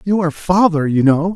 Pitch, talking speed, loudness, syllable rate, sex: 170 Hz, 220 wpm, -15 LUFS, 5.6 syllables/s, male